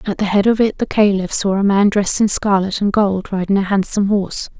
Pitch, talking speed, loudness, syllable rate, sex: 200 Hz, 250 wpm, -16 LUFS, 5.9 syllables/s, female